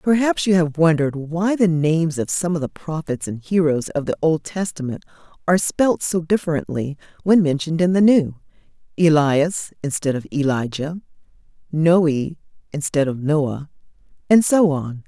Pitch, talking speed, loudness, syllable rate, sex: 160 Hz, 145 wpm, -19 LUFS, 4.8 syllables/s, female